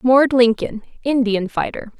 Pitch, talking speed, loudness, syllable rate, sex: 240 Hz, 120 wpm, -18 LUFS, 4.3 syllables/s, female